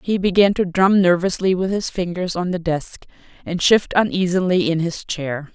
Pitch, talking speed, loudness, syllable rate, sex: 180 Hz, 185 wpm, -19 LUFS, 4.8 syllables/s, female